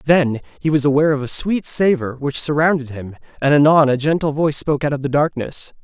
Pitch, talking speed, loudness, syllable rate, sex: 145 Hz, 215 wpm, -17 LUFS, 6.0 syllables/s, male